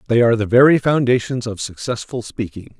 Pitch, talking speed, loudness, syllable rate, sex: 120 Hz, 170 wpm, -17 LUFS, 5.8 syllables/s, male